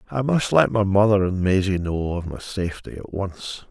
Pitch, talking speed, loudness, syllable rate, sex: 100 Hz, 195 wpm, -22 LUFS, 4.9 syllables/s, male